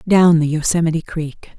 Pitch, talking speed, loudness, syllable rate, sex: 160 Hz, 150 wpm, -16 LUFS, 5.1 syllables/s, female